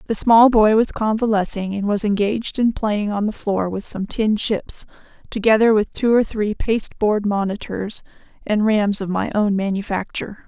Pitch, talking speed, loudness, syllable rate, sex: 210 Hz, 170 wpm, -19 LUFS, 4.8 syllables/s, female